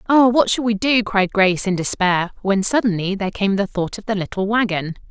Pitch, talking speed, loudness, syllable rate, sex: 205 Hz, 225 wpm, -18 LUFS, 5.5 syllables/s, female